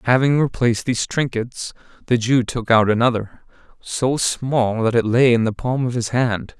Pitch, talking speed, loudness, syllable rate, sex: 120 Hz, 180 wpm, -19 LUFS, 4.7 syllables/s, male